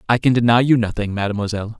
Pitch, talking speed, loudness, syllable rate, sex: 115 Hz, 200 wpm, -18 LUFS, 7.4 syllables/s, male